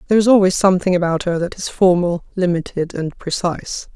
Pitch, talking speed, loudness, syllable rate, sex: 180 Hz, 180 wpm, -17 LUFS, 6.0 syllables/s, female